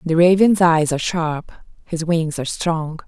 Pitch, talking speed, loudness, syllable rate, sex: 165 Hz, 175 wpm, -18 LUFS, 4.6 syllables/s, female